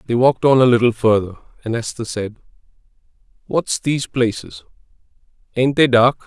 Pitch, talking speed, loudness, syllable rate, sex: 120 Hz, 145 wpm, -17 LUFS, 5.6 syllables/s, male